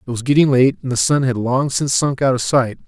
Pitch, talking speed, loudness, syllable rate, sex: 130 Hz, 290 wpm, -16 LUFS, 5.8 syllables/s, male